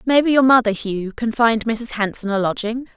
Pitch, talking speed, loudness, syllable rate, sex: 225 Hz, 205 wpm, -18 LUFS, 5.0 syllables/s, female